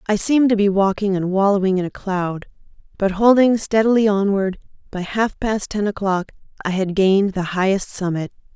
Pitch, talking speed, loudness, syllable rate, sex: 200 Hz, 175 wpm, -19 LUFS, 5.3 syllables/s, female